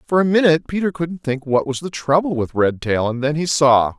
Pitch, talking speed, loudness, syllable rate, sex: 150 Hz, 240 wpm, -18 LUFS, 5.5 syllables/s, male